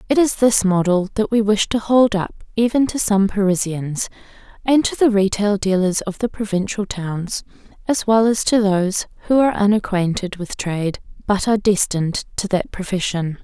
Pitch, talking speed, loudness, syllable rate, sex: 205 Hz, 175 wpm, -19 LUFS, 5.0 syllables/s, female